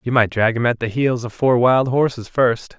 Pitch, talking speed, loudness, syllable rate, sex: 120 Hz, 260 wpm, -18 LUFS, 4.8 syllables/s, male